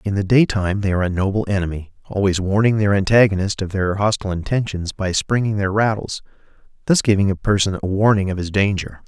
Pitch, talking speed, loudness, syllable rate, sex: 100 Hz, 190 wpm, -19 LUFS, 6.0 syllables/s, male